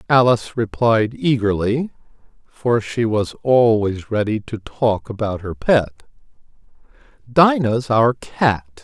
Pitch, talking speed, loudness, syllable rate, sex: 115 Hz, 110 wpm, -18 LUFS, 3.6 syllables/s, male